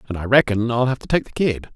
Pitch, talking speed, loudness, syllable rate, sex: 120 Hz, 310 wpm, -19 LUFS, 6.8 syllables/s, male